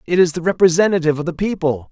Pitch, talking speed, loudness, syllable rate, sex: 170 Hz, 220 wpm, -17 LUFS, 7.3 syllables/s, male